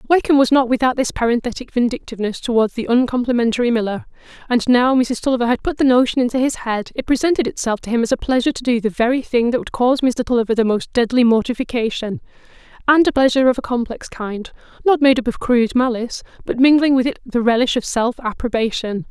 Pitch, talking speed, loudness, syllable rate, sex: 245 Hz, 205 wpm, -17 LUFS, 6.5 syllables/s, female